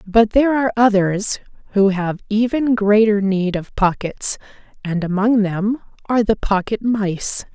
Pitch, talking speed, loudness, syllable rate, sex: 210 Hz, 145 wpm, -18 LUFS, 4.4 syllables/s, female